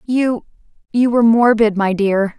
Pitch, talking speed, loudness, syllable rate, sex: 225 Hz, 125 wpm, -15 LUFS, 4.5 syllables/s, female